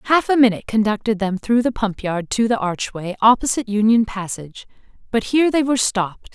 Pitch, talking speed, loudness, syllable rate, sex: 220 Hz, 190 wpm, -19 LUFS, 6.0 syllables/s, female